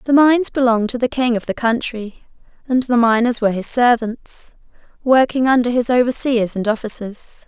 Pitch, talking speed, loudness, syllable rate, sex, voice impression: 240 Hz, 170 wpm, -17 LUFS, 5.3 syllables/s, female, very feminine, young, slightly adult-like, very thin, slightly tensed, slightly powerful, bright, hard, very clear, fluent, very cute, intellectual, very refreshing, sincere, calm, very friendly, very reassuring, unique, elegant, slightly wild, sweet, very lively, slightly strict, intense, slightly sharp, modest, light